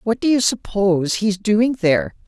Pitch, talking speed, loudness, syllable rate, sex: 210 Hz, 185 wpm, -18 LUFS, 5.0 syllables/s, female